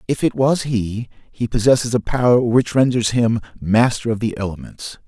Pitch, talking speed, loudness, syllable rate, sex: 115 Hz, 175 wpm, -18 LUFS, 4.9 syllables/s, male